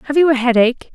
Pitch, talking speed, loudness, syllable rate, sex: 265 Hz, 255 wpm, -14 LUFS, 7.9 syllables/s, female